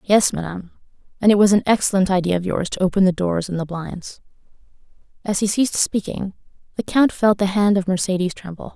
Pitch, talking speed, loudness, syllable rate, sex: 190 Hz, 200 wpm, -19 LUFS, 6.0 syllables/s, female